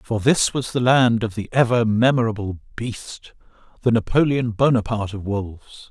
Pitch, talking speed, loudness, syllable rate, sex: 115 Hz, 150 wpm, -20 LUFS, 4.9 syllables/s, male